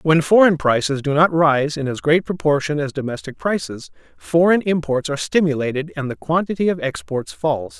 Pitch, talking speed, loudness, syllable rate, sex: 150 Hz, 175 wpm, -19 LUFS, 5.2 syllables/s, male